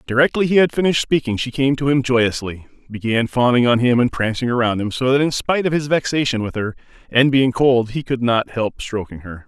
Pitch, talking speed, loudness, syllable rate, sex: 125 Hz, 230 wpm, -18 LUFS, 5.6 syllables/s, male